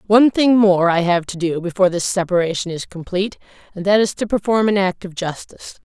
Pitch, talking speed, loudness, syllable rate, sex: 190 Hz, 215 wpm, -18 LUFS, 6.1 syllables/s, female